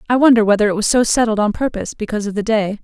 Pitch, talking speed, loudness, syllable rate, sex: 215 Hz, 275 wpm, -16 LUFS, 7.6 syllables/s, female